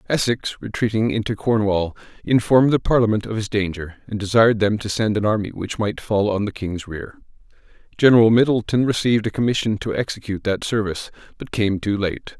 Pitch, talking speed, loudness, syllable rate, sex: 110 Hz, 180 wpm, -20 LUFS, 5.8 syllables/s, male